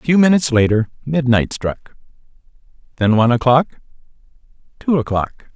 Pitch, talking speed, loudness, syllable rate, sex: 130 Hz, 110 wpm, -16 LUFS, 5.4 syllables/s, male